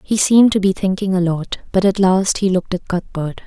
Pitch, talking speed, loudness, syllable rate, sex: 185 Hz, 245 wpm, -16 LUFS, 5.6 syllables/s, female